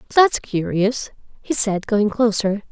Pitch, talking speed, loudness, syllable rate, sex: 220 Hz, 135 wpm, -19 LUFS, 4.0 syllables/s, female